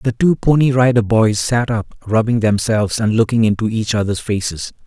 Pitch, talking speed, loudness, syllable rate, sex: 115 Hz, 185 wpm, -16 LUFS, 5.2 syllables/s, male